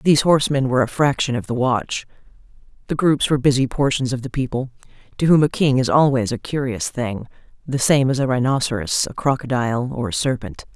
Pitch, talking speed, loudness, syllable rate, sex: 130 Hz, 195 wpm, -19 LUFS, 5.9 syllables/s, female